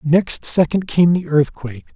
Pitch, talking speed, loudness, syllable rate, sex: 155 Hz, 155 wpm, -17 LUFS, 4.3 syllables/s, male